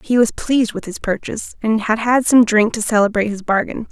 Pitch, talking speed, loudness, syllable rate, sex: 220 Hz, 230 wpm, -17 LUFS, 5.8 syllables/s, female